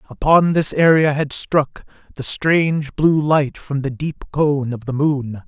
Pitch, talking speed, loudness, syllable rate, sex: 145 Hz, 175 wpm, -17 LUFS, 3.9 syllables/s, male